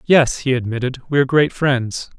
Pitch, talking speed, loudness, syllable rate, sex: 130 Hz, 165 wpm, -18 LUFS, 4.8 syllables/s, male